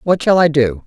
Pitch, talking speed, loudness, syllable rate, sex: 150 Hz, 275 wpm, -13 LUFS, 5.2 syllables/s, male